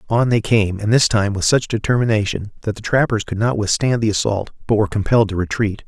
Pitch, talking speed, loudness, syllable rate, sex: 110 Hz, 225 wpm, -18 LUFS, 6.1 syllables/s, male